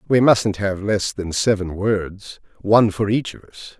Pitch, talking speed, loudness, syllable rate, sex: 100 Hz, 190 wpm, -19 LUFS, 4.1 syllables/s, male